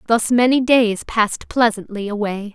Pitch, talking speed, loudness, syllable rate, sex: 225 Hz, 140 wpm, -18 LUFS, 4.6 syllables/s, female